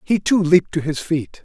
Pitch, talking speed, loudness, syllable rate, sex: 165 Hz, 250 wpm, -18 LUFS, 4.5 syllables/s, male